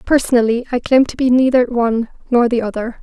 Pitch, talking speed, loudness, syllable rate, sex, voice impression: 240 Hz, 200 wpm, -15 LUFS, 6.0 syllables/s, female, feminine, adult-like, slightly soft, calm, slightly friendly, reassuring, slightly sweet, kind